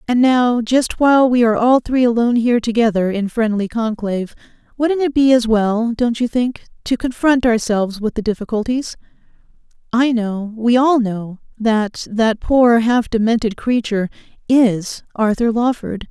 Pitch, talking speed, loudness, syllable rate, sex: 230 Hz, 155 wpm, -16 LUFS, 4.7 syllables/s, female